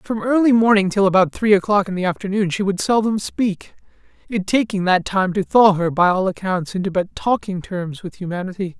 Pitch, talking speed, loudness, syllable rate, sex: 195 Hz, 200 wpm, -18 LUFS, 5.4 syllables/s, male